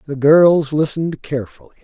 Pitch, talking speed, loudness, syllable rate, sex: 150 Hz, 130 wpm, -15 LUFS, 5.8 syllables/s, male